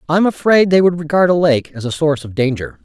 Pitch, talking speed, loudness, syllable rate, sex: 160 Hz, 275 wpm, -15 LUFS, 6.5 syllables/s, male